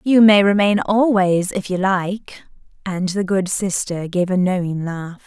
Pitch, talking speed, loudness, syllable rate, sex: 190 Hz, 170 wpm, -18 LUFS, 4.0 syllables/s, female